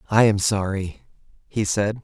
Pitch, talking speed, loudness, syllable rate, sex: 100 Hz, 150 wpm, -22 LUFS, 4.3 syllables/s, male